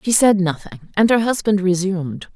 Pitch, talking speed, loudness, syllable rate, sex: 190 Hz, 180 wpm, -17 LUFS, 5.3 syllables/s, female